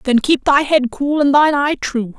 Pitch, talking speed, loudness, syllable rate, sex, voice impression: 275 Hz, 245 wpm, -15 LUFS, 4.8 syllables/s, female, very feminine, very adult-like, middle-aged, very thin, very tensed, very powerful, bright, very hard, very clear, very fluent, slightly cool, slightly intellectual, very refreshing, slightly sincere, very unique, slightly elegant, wild, very strict, very intense, very sharp, light